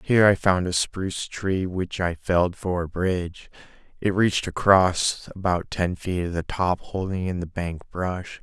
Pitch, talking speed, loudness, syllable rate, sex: 90 Hz, 185 wpm, -24 LUFS, 4.4 syllables/s, male